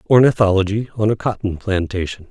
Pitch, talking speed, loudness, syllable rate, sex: 100 Hz, 130 wpm, -18 LUFS, 5.7 syllables/s, male